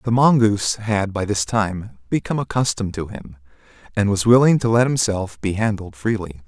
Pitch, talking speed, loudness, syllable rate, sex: 105 Hz, 175 wpm, -19 LUFS, 5.3 syllables/s, male